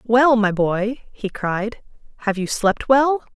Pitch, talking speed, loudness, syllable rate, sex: 225 Hz, 160 wpm, -20 LUFS, 3.4 syllables/s, female